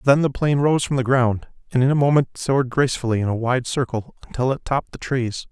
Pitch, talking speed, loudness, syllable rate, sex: 130 Hz, 240 wpm, -21 LUFS, 6.2 syllables/s, male